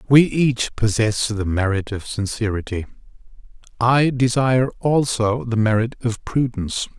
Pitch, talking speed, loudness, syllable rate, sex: 115 Hz, 120 wpm, -20 LUFS, 4.5 syllables/s, male